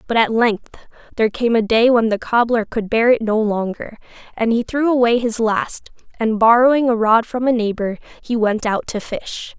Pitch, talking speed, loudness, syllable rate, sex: 230 Hz, 205 wpm, -17 LUFS, 4.9 syllables/s, female